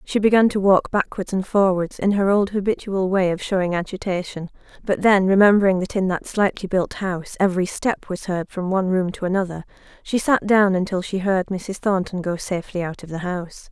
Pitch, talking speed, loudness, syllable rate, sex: 190 Hz, 205 wpm, -21 LUFS, 5.5 syllables/s, female